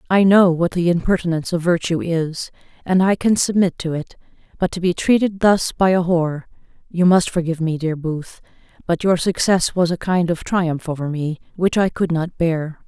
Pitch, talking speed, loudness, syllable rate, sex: 175 Hz, 195 wpm, -18 LUFS, 5.1 syllables/s, female